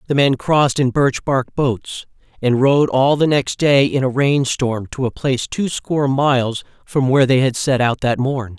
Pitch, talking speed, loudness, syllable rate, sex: 130 Hz, 215 wpm, -17 LUFS, 4.6 syllables/s, male